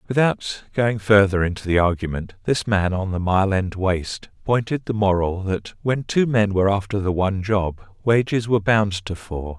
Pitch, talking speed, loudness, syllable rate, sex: 100 Hz, 190 wpm, -21 LUFS, 4.9 syllables/s, male